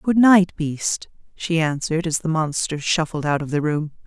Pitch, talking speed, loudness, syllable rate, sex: 160 Hz, 190 wpm, -20 LUFS, 4.6 syllables/s, female